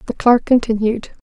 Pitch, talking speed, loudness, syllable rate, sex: 230 Hz, 145 wpm, -16 LUFS, 5.0 syllables/s, female